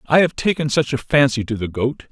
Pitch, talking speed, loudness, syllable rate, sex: 135 Hz, 255 wpm, -19 LUFS, 5.5 syllables/s, male